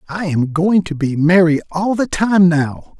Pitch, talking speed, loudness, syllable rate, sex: 170 Hz, 200 wpm, -15 LUFS, 4.1 syllables/s, male